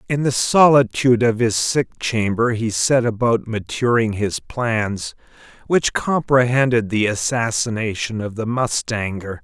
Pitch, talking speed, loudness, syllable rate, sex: 115 Hz, 125 wpm, -19 LUFS, 4.1 syllables/s, male